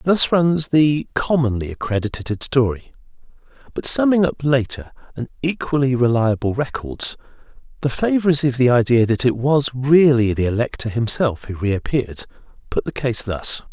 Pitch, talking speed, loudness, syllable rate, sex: 130 Hz, 140 wpm, -19 LUFS, 4.8 syllables/s, male